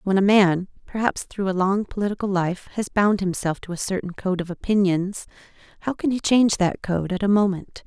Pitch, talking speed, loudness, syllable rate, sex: 195 Hz, 205 wpm, -22 LUFS, 5.4 syllables/s, female